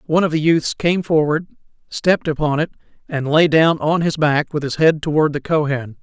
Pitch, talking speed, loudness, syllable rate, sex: 155 Hz, 210 wpm, -17 LUFS, 5.4 syllables/s, male